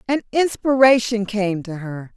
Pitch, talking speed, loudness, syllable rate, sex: 220 Hz, 140 wpm, -19 LUFS, 4.2 syllables/s, female